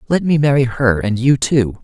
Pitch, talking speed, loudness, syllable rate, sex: 130 Hz, 230 wpm, -15 LUFS, 5.0 syllables/s, male